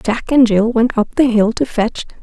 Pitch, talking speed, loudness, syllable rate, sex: 230 Hz, 245 wpm, -14 LUFS, 4.4 syllables/s, female